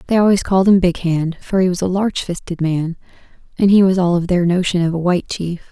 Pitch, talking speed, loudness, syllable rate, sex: 180 Hz, 250 wpm, -16 LUFS, 6.1 syllables/s, female